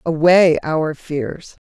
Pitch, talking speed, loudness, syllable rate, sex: 160 Hz, 110 wpm, -16 LUFS, 2.8 syllables/s, female